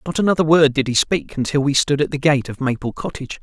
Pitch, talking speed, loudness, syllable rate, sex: 145 Hz, 265 wpm, -18 LUFS, 6.3 syllables/s, male